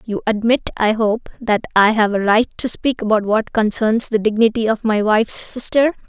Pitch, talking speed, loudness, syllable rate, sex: 220 Hz, 195 wpm, -17 LUFS, 4.9 syllables/s, female